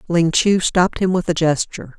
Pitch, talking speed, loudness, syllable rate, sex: 170 Hz, 210 wpm, -17 LUFS, 5.5 syllables/s, female